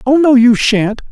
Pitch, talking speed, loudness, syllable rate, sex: 250 Hz, 215 wpm, -10 LUFS, 4.4 syllables/s, male